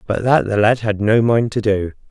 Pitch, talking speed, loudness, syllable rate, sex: 110 Hz, 255 wpm, -16 LUFS, 5.0 syllables/s, male